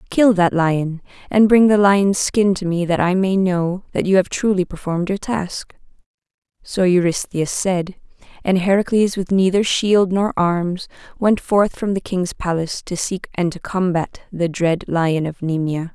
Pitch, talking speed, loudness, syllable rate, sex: 185 Hz, 175 wpm, -18 LUFS, 4.4 syllables/s, female